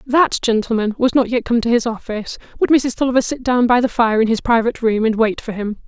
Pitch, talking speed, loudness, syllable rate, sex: 235 Hz, 255 wpm, -17 LUFS, 6.1 syllables/s, female